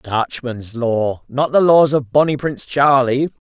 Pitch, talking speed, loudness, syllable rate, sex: 130 Hz, 155 wpm, -16 LUFS, 4.0 syllables/s, male